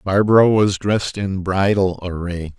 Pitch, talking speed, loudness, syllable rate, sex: 95 Hz, 140 wpm, -18 LUFS, 4.5 syllables/s, male